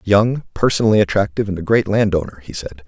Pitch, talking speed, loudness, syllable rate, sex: 95 Hz, 190 wpm, -17 LUFS, 6.4 syllables/s, male